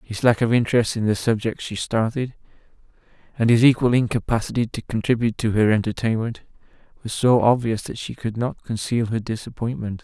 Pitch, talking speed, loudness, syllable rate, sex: 115 Hz, 165 wpm, -21 LUFS, 5.8 syllables/s, male